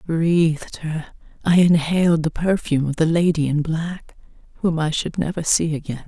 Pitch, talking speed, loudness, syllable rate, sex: 160 Hz, 170 wpm, -20 LUFS, 5.0 syllables/s, female